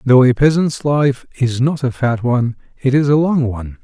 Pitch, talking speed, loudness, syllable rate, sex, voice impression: 130 Hz, 220 wpm, -16 LUFS, 5.0 syllables/s, male, very masculine, very adult-like, slightly thick, slightly muffled, cool, slightly calm, slightly friendly, slightly kind